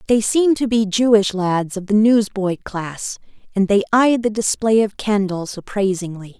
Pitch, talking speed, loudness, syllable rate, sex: 205 Hz, 170 wpm, -18 LUFS, 4.6 syllables/s, female